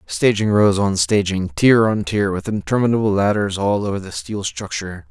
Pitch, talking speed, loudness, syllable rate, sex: 100 Hz, 175 wpm, -18 LUFS, 5.0 syllables/s, male